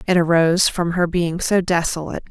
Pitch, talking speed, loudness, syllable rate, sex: 170 Hz, 180 wpm, -18 LUFS, 5.7 syllables/s, female